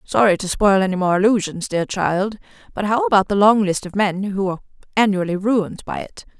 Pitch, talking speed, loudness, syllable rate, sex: 195 Hz, 205 wpm, -19 LUFS, 5.7 syllables/s, female